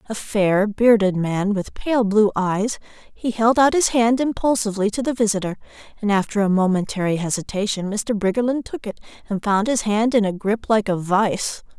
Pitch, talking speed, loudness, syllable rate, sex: 210 Hz, 185 wpm, -20 LUFS, 5.0 syllables/s, female